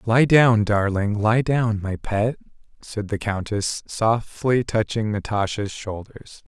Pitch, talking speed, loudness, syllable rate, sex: 110 Hz, 130 wpm, -22 LUFS, 3.6 syllables/s, male